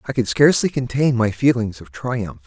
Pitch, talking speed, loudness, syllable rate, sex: 115 Hz, 195 wpm, -19 LUFS, 5.1 syllables/s, male